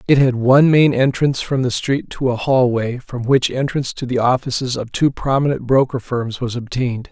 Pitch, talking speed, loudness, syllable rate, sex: 130 Hz, 200 wpm, -17 LUFS, 5.3 syllables/s, male